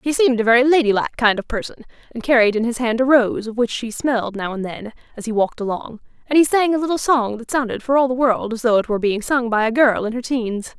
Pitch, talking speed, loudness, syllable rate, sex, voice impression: 240 Hz, 280 wpm, -18 LUFS, 6.3 syllables/s, female, feminine, adult-like, tensed, very powerful, slightly hard, very fluent, slightly friendly, slightly wild, lively, strict, intense, sharp